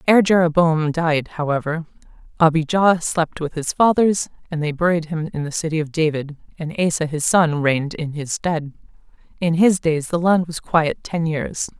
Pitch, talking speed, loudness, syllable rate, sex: 160 Hz, 180 wpm, -19 LUFS, 4.8 syllables/s, female